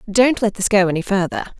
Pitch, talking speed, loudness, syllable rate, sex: 195 Hz, 225 wpm, -17 LUFS, 5.6 syllables/s, female